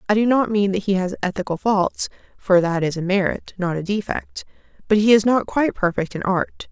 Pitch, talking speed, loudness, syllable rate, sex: 195 Hz, 225 wpm, -20 LUFS, 5.4 syllables/s, female